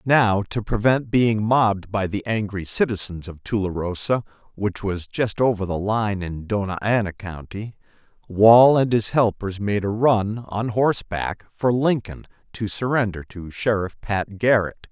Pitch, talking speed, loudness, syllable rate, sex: 105 Hz, 155 wpm, -21 LUFS, 4.3 syllables/s, male